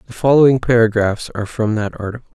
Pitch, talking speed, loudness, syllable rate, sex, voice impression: 115 Hz, 175 wpm, -16 LUFS, 6.6 syllables/s, male, masculine, adult-like, slightly thick, tensed, slightly dark, soft, clear, fluent, intellectual, calm, reassuring, wild, modest